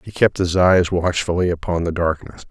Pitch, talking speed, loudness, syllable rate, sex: 90 Hz, 190 wpm, -19 LUFS, 5.0 syllables/s, male